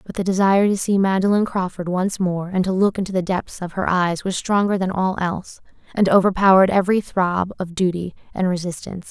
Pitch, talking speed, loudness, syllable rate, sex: 185 Hz, 205 wpm, -20 LUFS, 5.8 syllables/s, female